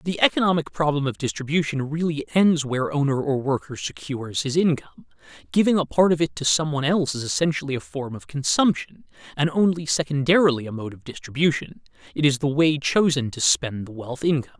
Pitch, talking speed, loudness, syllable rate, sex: 145 Hz, 190 wpm, -22 LUFS, 6.0 syllables/s, male